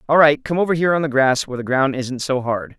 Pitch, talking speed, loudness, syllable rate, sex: 140 Hz, 300 wpm, -18 LUFS, 6.5 syllables/s, male